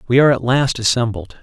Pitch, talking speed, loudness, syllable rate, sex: 120 Hz, 210 wpm, -16 LUFS, 6.3 syllables/s, male